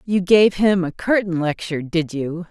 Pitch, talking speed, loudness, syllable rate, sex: 180 Hz, 190 wpm, -19 LUFS, 4.6 syllables/s, female